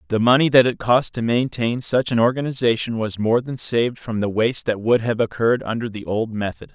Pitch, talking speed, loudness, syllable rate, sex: 115 Hz, 220 wpm, -20 LUFS, 5.7 syllables/s, male